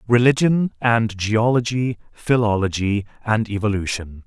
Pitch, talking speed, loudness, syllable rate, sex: 110 Hz, 85 wpm, -20 LUFS, 4.4 syllables/s, male